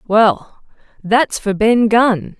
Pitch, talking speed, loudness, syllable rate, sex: 215 Hz, 125 wpm, -14 LUFS, 2.7 syllables/s, female